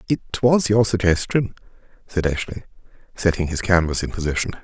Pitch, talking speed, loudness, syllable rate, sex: 95 Hz, 140 wpm, -21 LUFS, 5.7 syllables/s, male